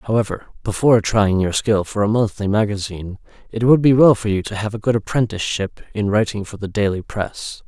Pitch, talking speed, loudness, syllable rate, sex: 105 Hz, 205 wpm, -18 LUFS, 5.7 syllables/s, male